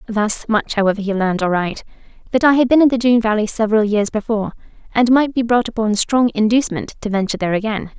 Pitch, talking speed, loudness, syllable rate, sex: 220 Hz, 210 wpm, -17 LUFS, 6.8 syllables/s, female